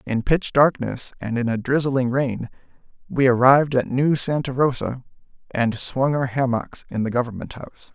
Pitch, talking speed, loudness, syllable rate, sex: 130 Hz, 165 wpm, -21 LUFS, 5.0 syllables/s, male